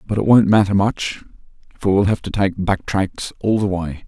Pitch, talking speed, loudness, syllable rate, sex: 100 Hz, 220 wpm, -18 LUFS, 5.0 syllables/s, male